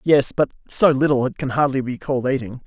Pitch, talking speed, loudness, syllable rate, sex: 135 Hz, 225 wpm, -20 LUFS, 5.9 syllables/s, male